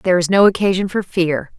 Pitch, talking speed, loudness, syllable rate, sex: 185 Hz, 225 wpm, -16 LUFS, 5.9 syllables/s, female